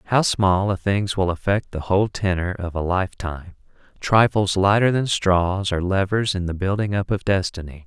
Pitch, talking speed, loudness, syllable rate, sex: 95 Hz, 190 wpm, -21 LUFS, 4.9 syllables/s, male